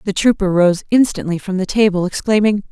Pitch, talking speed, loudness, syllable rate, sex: 195 Hz, 175 wpm, -16 LUFS, 5.6 syllables/s, female